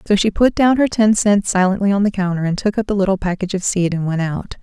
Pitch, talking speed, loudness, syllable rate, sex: 195 Hz, 285 wpm, -17 LUFS, 6.2 syllables/s, female